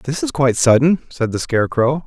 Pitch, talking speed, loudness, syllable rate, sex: 135 Hz, 205 wpm, -16 LUFS, 5.6 syllables/s, male